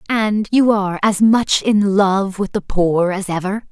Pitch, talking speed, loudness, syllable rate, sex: 200 Hz, 195 wpm, -16 LUFS, 4.1 syllables/s, female